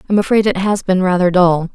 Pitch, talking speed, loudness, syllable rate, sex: 190 Hz, 240 wpm, -14 LUFS, 5.8 syllables/s, female